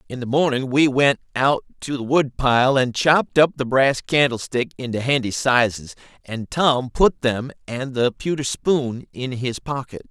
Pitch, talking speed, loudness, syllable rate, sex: 130 Hz, 170 wpm, -20 LUFS, 4.5 syllables/s, male